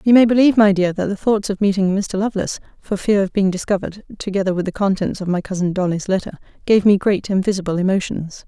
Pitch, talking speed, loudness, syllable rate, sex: 195 Hz, 225 wpm, -18 LUFS, 6.5 syllables/s, female